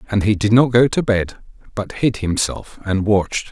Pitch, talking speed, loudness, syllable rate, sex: 105 Hz, 205 wpm, -18 LUFS, 4.8 syllables/s, male